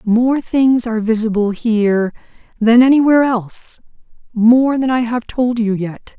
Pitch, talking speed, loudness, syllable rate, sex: 230 Hz, 135 wpm, -15 LUFS, 4.5 syllables/s, female